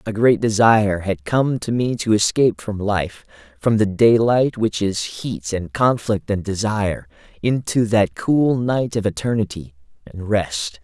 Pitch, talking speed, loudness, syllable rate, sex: 105 Hz, 155 wpm, -19 LUFS, 4.2 syllables/s, male